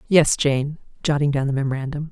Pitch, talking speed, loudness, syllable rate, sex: 145 Hz, 170 wpm, -21 LUFS, 5.9 syllables/s, female